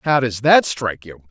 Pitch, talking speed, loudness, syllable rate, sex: 120 Hz, 230 wpm, -17 LUFS, 5.5 syllables/s, male